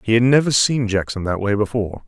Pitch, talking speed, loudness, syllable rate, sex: 110 Hz, 230 wpm, -18 LUFS, 6.2 syllables/s, male